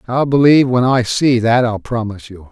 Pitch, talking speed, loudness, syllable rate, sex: 120 Hz, 215 wpm, -14 LUFS, 5.5 syllables/s, male